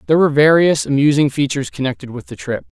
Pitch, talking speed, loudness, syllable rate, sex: 140 Hz, 195 wpm, -15 LUFS, 7.3 syllables/s, male